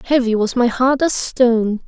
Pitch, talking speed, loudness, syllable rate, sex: 245 Hz, 190 wpm, -16 LUFS, 4.7 syllables/s, female